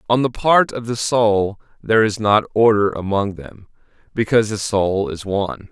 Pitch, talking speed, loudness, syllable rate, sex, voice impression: 105 Hz, 180 wpm, -18 LUFS, 4.8 syllables/s, male, masculine, adult-like, slightly middle-aged, slightly thick, slightly tensed, slightly weak, bright, soft, clear, slightly halting, slightly cool, intellectual, refreshing, very sincere, very calm, slightly mature, friendly, reassuring, slightly unique, elegant, slightly wild, slightly sweet, slightly lively, kind, modest